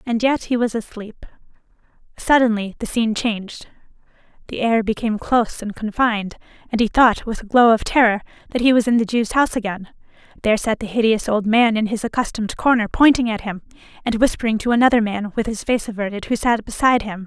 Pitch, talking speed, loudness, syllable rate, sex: 225 Hz, 200 wpm, -19 LUFS, 6.2 syllables/s, female